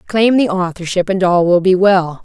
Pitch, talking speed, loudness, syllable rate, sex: 185 Hz, 215 wpm, -13 LUFS, 4.8 syllables/s, female